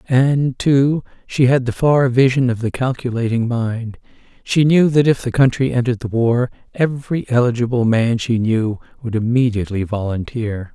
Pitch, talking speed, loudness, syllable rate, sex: 120 Hz, 155 wpm, -17 LUFS, 4.9 syllables/s, male